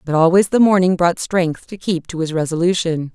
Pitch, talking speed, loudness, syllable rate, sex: 175 Hz, 210 wpm, -17 LUFS, 5.3 syllables/s, female